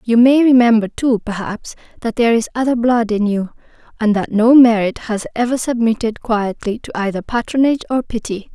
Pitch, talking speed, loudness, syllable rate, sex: 230 Hz, 170 wpm, -16 LUFS, 5.4 syllables/s, female